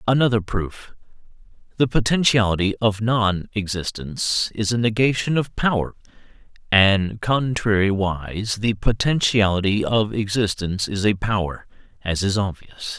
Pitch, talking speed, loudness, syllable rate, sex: 105 Hz, 100 wpm, -21 LUFS, 4.5 syllables/s, male